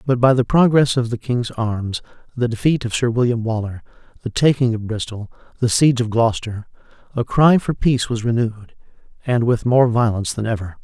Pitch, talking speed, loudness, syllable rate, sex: 120 Hz, 190 wpm, -18 LUFS, 5.7 syllables/s, male